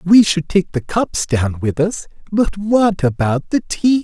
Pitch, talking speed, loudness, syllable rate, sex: 180 Hz, 195 wpm, -17 LUFS, 3.9 syllables/s, male